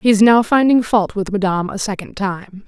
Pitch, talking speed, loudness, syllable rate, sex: 210 Hz, 225 wpm, -16 LUFS, 5.3 syllables/s, female